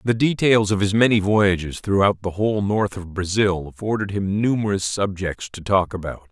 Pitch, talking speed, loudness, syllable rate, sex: 100 Hz, 180 wpm, -21 LUFS, 5.0 syllables/s, male